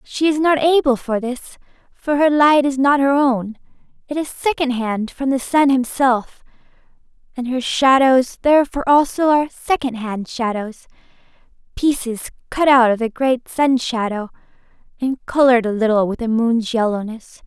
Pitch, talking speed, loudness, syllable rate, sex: 255 Hz, 150 wpm, -17 LUFS, 4.7 syllables/s, female